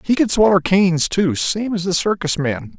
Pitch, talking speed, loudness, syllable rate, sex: 180 Hz, 215 wpm, -17 LUFS, 4.9 syllables/s, male